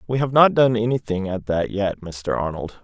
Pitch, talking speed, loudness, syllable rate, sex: 105 Hz, 210 wpm, -20 LUFS, 5.0 syllables/s, male